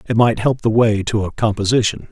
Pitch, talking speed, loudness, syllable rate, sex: 110 Hz, 225 wpm, -17 LUFS, 5.5 syllables/s, male